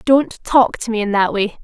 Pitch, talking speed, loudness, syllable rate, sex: 225 Hz, 255 wpm, -16 LUFS, 4.6 syllables/s, female